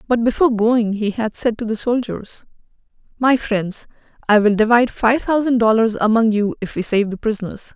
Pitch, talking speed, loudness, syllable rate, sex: 225 Hz, 185 wpm, -17 LUFS, 5.3 syllables/s, female